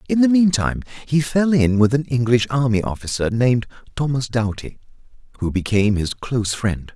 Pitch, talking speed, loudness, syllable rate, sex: 125 Hz, 165 wpm, -19 LUFS, 5.5 syllables/s, male